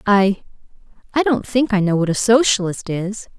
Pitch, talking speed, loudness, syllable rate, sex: 210 Hz, 160 wpm, -18 LUFS, 4.8 syllables/s, female